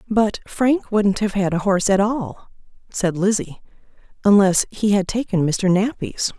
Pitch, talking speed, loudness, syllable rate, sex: 200 Hz, 160 wpm, -19 LUFS, 4.4 syllables/s, female